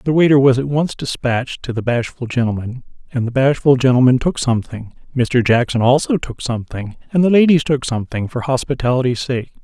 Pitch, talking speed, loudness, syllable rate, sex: 130 Hz, 180 wpm, -17 LUFS, 5.8 syllables/s, male